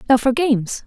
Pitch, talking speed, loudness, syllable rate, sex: 255 Hz, 210 wpm, -18 LUFS, 5.8 syllables/s, female